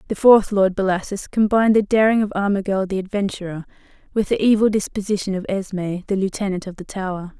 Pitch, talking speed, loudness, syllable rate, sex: 195 Hz, 180 wpm, -20 LUFS, 6.0 syllables/s, female